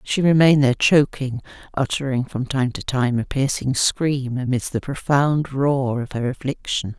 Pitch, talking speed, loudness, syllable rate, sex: 135 Hz, 165 wpm, -20 LUFS, 4.6 syllables/s, female